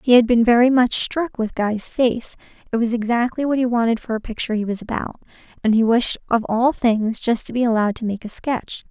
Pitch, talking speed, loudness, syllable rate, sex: 235 Hz, 235 wpm, -20 LUFS, 5.6 syllables/s, female